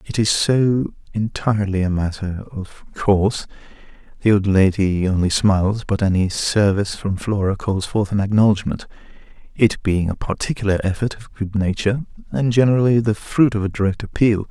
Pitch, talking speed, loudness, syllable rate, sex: 105 Hz, 155 wpm, -19 LUFS, 5.2 syllables/s, male